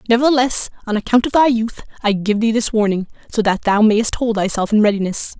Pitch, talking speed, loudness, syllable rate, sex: 220 Hz, 210 wpm, -17 LUFS, 5.9 syllables/s, female